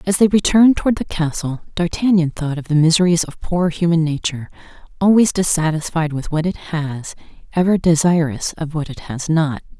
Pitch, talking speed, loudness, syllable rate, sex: 165 Hz, 170 wpm, -17 LUFS, 5.4 syllables/s, female